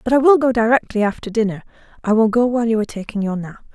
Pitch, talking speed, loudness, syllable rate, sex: 225 Hz, 255 wpm, -18 LUFS, 7.3 syllables/s, female